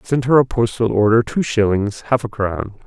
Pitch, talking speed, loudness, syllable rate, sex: 115 Hz, 210 wpm, -17 LUFS, 4.9 syllables/s, male